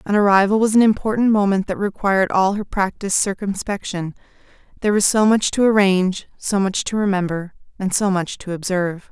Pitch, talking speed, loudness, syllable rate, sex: 195 Hz, 180 wpm, -18 LUFS, 5.8 syllables/s, female